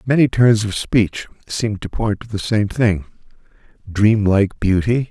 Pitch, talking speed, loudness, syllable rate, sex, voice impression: 105 Hz, 140 wpm, -18 LUFS, 4.3 syllables/s, male, masculine, slightly middle-aged, slightly thick, cool, slightly calm, friendly, slightly reassuring